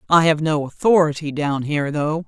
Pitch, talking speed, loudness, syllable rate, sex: 155 Hz, 185 wpm, -19 LUFS, 5.3 syllables/s, female